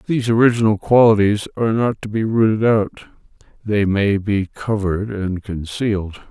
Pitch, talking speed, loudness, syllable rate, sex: 105 Hz, 145 wpm, -18 LUFS, 5.0 syllables/s, male